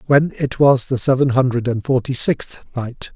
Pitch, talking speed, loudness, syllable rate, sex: 130 Hz, 190 wpm, -18 LUFS, 4.4 syllables/s, male